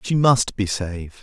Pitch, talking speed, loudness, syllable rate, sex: 110 Hz, 195 wpm, -20 LUFS, 4.8 syllables/s, male